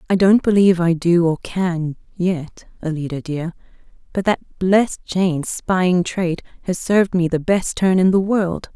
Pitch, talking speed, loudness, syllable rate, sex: 180 Hz, 170 wpm, -18 LUFS, 4.5 syllables/s, female